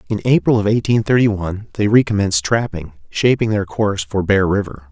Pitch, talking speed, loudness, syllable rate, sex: 100 Hz, 185 wpm, -17 LUFS, 5.9 syllables/s, male